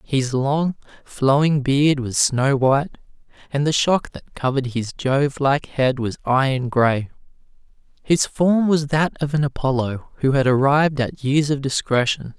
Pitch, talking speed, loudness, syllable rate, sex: 140 Hz, 160 wpm, -20 LUFS, 4.3 syllables/s, male